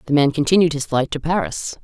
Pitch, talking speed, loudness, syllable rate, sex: 145 Hz, 230 wpm, -19 LUFS, 6.1 syllables/s, female